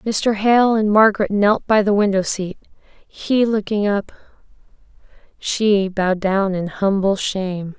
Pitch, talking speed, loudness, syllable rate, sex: 205 Hz, 130 wpm, -18 LUFS, 4.1 syllables/s, female